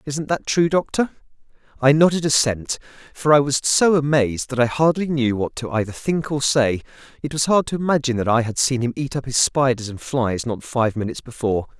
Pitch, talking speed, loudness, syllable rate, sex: 135 Hz, 215 wpm, -20 LUFS, 5.7 syllables/s, male